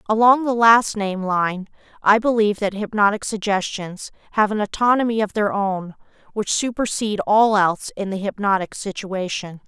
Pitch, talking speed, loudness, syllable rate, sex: 210 Hz, 150 wpm, -20 LUFS, 5.1 syllables/s, female